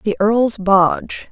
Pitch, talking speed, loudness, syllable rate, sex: 205 Hz, 135 wpm, -16 LUFS, 3.4 syllables/s, female